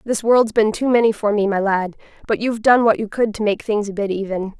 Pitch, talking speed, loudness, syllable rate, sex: 215 Hz, 275 wpm, -18 LUFS, 5.8 syllables/s, female